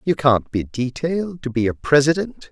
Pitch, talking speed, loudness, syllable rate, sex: 140 Hz, 190 wpm, -20 LUFS, 5.0 syllables/s, male